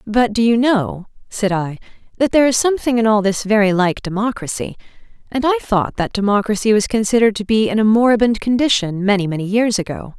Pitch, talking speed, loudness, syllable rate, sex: 215 Hz, 195 wpm, -16 LUFS, 6.0 syllables/s, female